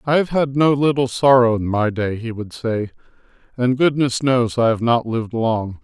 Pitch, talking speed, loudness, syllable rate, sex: 120 Hz, 205 wpm, -18 LUFS, 4.8 syllables/s, male